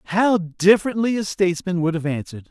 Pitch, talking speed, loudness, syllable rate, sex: 185 Hz, 170 wpm, -20 LUFS, 6.3 syllables/s, male